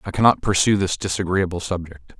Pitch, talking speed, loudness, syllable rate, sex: 95 Hz, 165 wpm, -20 LUFS, 5.9 syllables/s, male